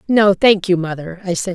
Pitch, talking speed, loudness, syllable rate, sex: 185 Hz, 235 wpm, -16 LUFS, 5.0 syllables/s, female